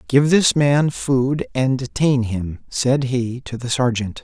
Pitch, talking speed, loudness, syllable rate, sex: 130 Hz, 170 wpm, -19 LUFS, 3.6 syllables/s, male